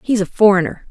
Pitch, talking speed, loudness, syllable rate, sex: 200 Hz, 200 wpm, -14 LUFS, 6.3 syllables/s, female